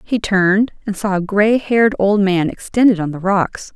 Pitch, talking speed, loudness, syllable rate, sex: 200 Hz, 210 wpm, -16 LUFS, 4.8 syllables/s, female